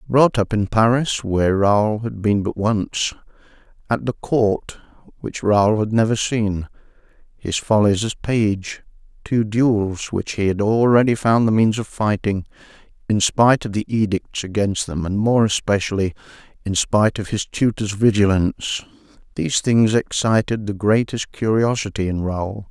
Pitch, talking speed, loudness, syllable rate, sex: 105 Hz, 150 wpm, -19 LUFS, 4.4 syllables/s, male